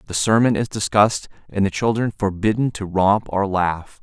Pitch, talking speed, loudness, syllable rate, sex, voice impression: 100 Hz, 180 wpm, -20 LUFS, 5.0 syllables/s, male, very masculine, very adult-like, slightly middle-aged, thick, tensed, powerful, bright, slightly soft, clear, fluent, cool, very intellectual, refreshing, very sincere, very calm, slightly mature, friendly, reassuring, slightly unique, elegant, slightly wild, slightly sweet, slightly lively, kind, slightly modest